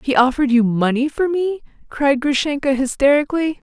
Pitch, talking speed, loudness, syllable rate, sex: 275 Hz, 145 wpm, -17 LUFS, 5.5 syllables/s, female